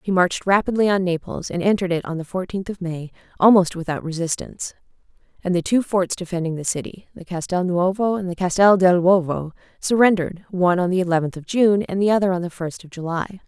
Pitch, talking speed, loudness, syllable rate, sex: 180 Hz, 205 wpm, -20 LUFS, 6.1 syllables/s, female